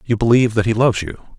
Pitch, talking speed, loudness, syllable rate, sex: 110 Hz, 260 wpm, -16 LUFS, 7.2 syllables/s, male